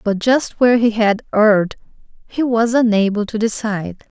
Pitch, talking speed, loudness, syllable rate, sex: 220 Hz, 160 wpm, -16 LUFS, 5.0 syllables/s, female